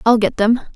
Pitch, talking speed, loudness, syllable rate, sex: 225 Hz, 240 wpm, -16 LUFS, 5.5 syllables/s, female